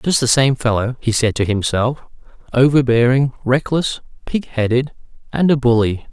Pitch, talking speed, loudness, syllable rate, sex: 125 Hz, 145 wpm, -17 LUFS, 4.9 syllables/s, male